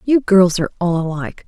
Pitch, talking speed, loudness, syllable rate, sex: 185 Hz, 205 wpm, -16 LUFS, 6.2 syllables/s, female